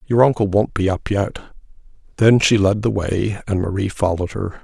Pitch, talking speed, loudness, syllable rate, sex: 100 Hz, 195 wpm, -18 LUFS, 5.2 syllables/s, male